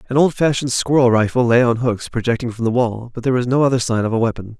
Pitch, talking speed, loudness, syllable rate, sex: 120 Hz, 260 wpm, -17 LUFS, 6.9 syllables/s, male